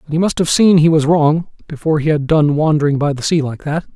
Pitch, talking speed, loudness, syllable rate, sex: 155 Hz, 275 wpm, -14 LUFS, 6.1 syllables/s, male